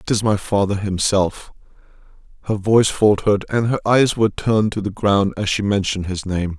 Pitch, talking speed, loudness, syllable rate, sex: 100 Hz, 190 wpm, -18 LUFS, 5.5 syllables/s, male